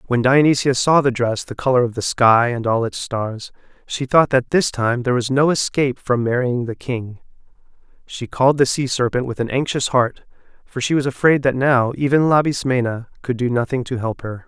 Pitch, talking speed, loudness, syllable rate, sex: 125 Hz, 205 wpm, -18 LUFS, 5.3 syllables/s, male